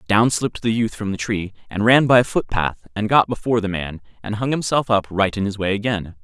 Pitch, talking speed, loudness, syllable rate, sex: 110 Hz, 250 wpm, -20 LUFS, 5.7 syllables/s, male